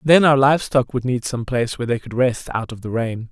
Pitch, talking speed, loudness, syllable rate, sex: 125 Hz, 290 wpm, -19 LUFS, 5.7 syllables/s, male